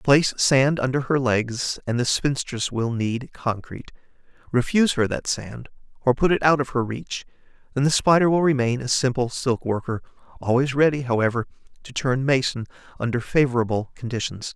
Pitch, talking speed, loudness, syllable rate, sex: 130 Hz, 165 wpm, -22 LUFS, 5.2 syllables/s, male